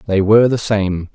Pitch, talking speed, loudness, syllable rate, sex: 105 Hz, 210 wpm, -14 LUFS, 5.2 syllables/s, male